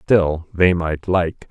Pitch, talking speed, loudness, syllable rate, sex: 85 Hz, 160 wpm, -18 LUFS, 2.8 syllables/s, male